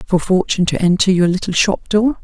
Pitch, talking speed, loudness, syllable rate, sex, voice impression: 190 Hz, 215 wpm, -15 LUFS, 5.8 syllables/s, female, very feminine, very adult-like, thin, relaxed, weak, dark, very soft, muffled, fluent, slightly raspy, cute, very intellectual, slightly refreshing, very sincere, very calm, very friendly, very reassuring, unique, very elegant, sweet, very kind, very modest, light